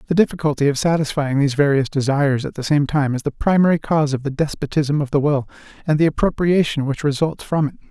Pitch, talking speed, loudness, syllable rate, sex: 145 Hz, 210 wpm, -19 LUFS, 6.4 syllables/s, male